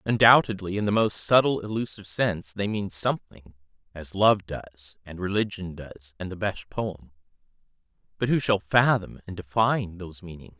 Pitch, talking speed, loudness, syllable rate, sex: 95 Hz, 145 wpm, -25 LUFS, 5.4 syllables/s, male